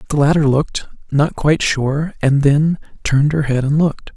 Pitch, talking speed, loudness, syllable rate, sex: 145 Hz, 190 wpm, -16 LUFS, 5.3 syllables/s, male